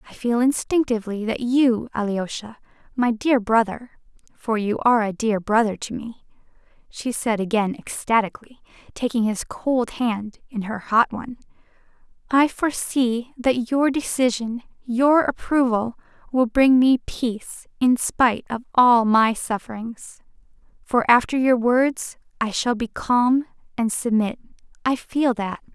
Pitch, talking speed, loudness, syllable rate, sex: 235 Hz, 135 wpm, -21 LUFS, 4.0 syllables/s, female